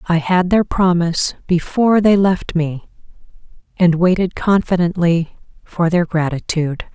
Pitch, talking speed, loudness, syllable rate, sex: 175 Hz, 120 wpm, -16 LUFS, 4.5 syllables/s, female